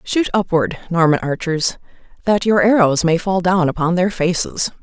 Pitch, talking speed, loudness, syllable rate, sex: 180 Hz, 160 wpm, -17 LUFS, 4.7 syllables/s, female